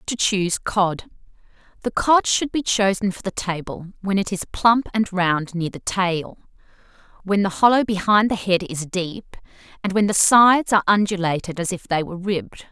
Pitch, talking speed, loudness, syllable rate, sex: 195 Hz, 180 wpm, -20 LUFS, 5.0 syllables/s, female